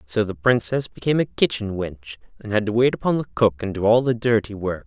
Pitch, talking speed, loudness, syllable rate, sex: 110 Hz, 245 wpm, -21 LUFS, 5.9 syllables/s, male